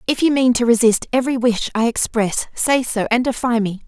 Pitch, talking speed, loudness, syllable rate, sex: 235 Hz, 215 wpm, -17 LUFS, 5.4 syllables/s, female